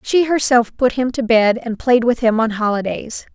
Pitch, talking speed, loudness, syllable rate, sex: 235 Hz, 215 wpm, -16 LUFS, 4.7 syllables/s, female